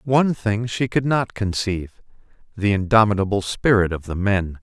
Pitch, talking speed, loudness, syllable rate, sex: 105 Hz, 145 wpm, -20 LUFS, 5.0 syllables/s, male